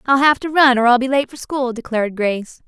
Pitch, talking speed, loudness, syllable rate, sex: 255 Hz, 270 wpm, -16 LUFS, 6.0 syllables/s, female